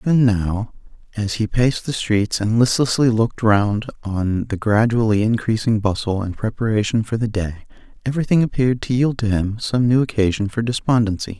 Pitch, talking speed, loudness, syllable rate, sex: 110 Hz, 170 wpm, -19 LUFS, 5.4 syllables/s, male